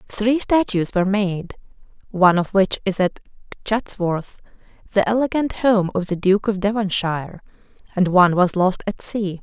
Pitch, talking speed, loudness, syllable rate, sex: 195 Hz, 155 wpm, -19 LUFS, 4.8 syllables/s, female